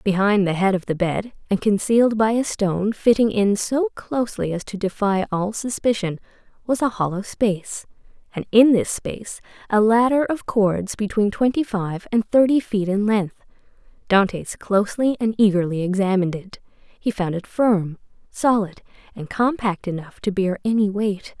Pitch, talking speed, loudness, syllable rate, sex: 210 Hz, 165 wpm, -21 LUFS, 4.8 syllables/s, female